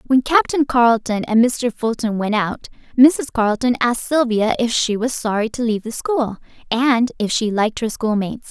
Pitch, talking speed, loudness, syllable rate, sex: 235 Hz, 185 wpm, -18 LUFS, 5.3 syllables/s, female